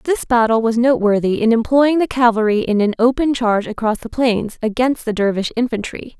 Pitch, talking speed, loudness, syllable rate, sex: 235 Hz, 185 wpm, -16 LUFS, 5.6 syllables/s, female